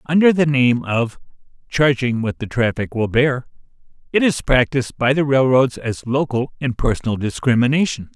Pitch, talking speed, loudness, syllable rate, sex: 130 Hz, 155 wpm, -18 LUFS, 5.0 syllables/s, male